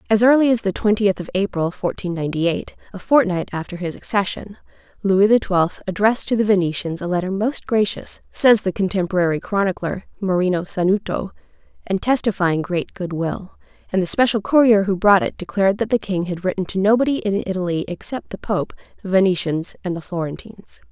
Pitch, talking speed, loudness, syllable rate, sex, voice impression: 195 Hz, 180 wpm, -19 LUFS, 5.7 syllables/s, female, feminine, adult-like, tensed, clear, fluent, intellectual, friendly, elegant, lively, slightly kind